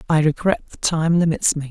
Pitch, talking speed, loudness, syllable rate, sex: 160 Hz, 210 wpm, -19 LUFS, 5.5 syllables/s, male